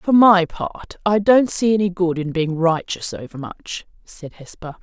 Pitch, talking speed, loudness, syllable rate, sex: 180 Hz, 175 wpm, -18 LUFS, 4.2 syllables/s, female